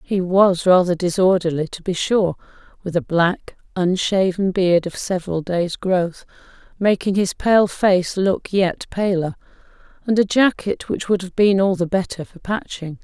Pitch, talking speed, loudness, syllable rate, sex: 185 Hz, 160 wpm, -19 LUFS, 4.4 syllables/s, female